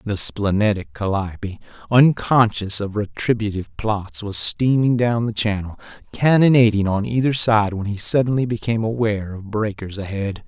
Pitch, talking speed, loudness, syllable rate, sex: 105 Hz, 135 wpm, -19 LUFS, 4.9 syllables/s, male